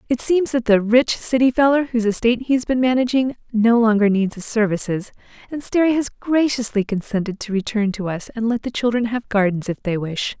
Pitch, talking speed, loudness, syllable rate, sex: 230 Hz, 210 wpm, -19 LUFS, 5.6 syllables/s, female